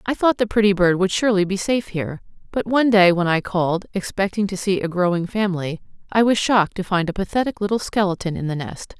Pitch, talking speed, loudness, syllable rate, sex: 195 Hz, 225 wpm, -20 LUFS, 6.3 syllables/s, female